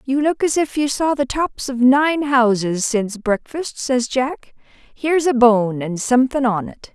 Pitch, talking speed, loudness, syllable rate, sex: 255 Hz, 190 wpm, -18 LUFS, 4.3 syllables/s, female